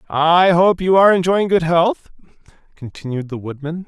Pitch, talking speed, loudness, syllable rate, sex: 170 Hz, 155 wpm, -16 LUFS, 4.9 syllables/s, male